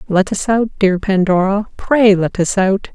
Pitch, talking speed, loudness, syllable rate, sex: 200 Hz, 165 wpm, -15 LUFS, 4.1 syllables/s, female